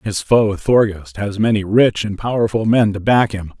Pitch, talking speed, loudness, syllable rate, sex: 105 Hz, 200 wpm, -16 LUFS, 4.6 syllables/s, male